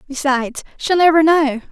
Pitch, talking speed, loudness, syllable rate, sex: 290 Hz, 140 wpm, -15 LUFS, 5.2 syllables/s, female